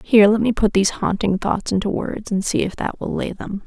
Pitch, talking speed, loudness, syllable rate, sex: 205 Hz, 260 wpm, -20 LUFS, 5.6 syllables/s, female